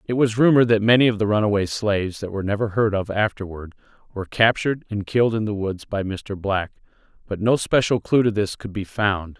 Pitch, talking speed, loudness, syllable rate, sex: 105 Hz, 215 wpm, -21 LUFS, 5.9 syllables/s, male